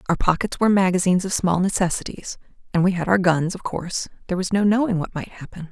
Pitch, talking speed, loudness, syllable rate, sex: 180 Hz, 210 wpm, -21 LUFS, 6.7 syllables/s, female